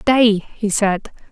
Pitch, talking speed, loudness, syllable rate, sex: 210 Hz, 135 wpm, -17 LUFS, 2.7 syllables/s, female